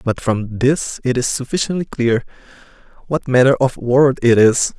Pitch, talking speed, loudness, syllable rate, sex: 125 Hz, 165 wpm, -16 LUFS, 4.6 syllables/s, male